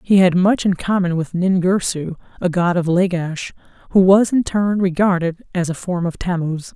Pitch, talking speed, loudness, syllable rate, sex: 180 Hz, 195 wpm, -18 LUFS, 4.7 syllables/s, female